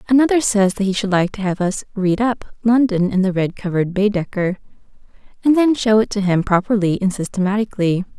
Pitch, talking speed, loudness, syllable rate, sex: 200 Hz, 190 wpm, -18 LUFS, 5.8 syllables/s, female